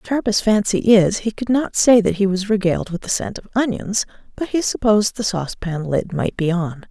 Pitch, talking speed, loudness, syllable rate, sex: 200 Hz, 225 wpm, -19 LUFS, 5.3 syllables/s, female